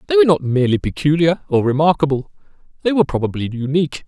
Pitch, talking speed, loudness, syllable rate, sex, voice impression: 155 Hz, 160 wpm, -17 LUFS, 7.3 syllables/s, male, very masculine, very middle-aged, very thick, slightly tensed, very powerful, bright, soft, clear, very fluent, slightly raspy, cool, intellectual, very refreshing, sincere, calm, slightly mature, friendly, very reassuring, very unique, slightly elegant, wild, sweet, very lively, kind, intense, light